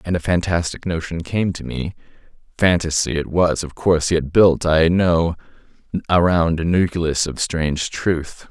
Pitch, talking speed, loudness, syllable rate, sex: 85 Hz, 150 wpm, -19 LUFS, 4.4 syllables/s, male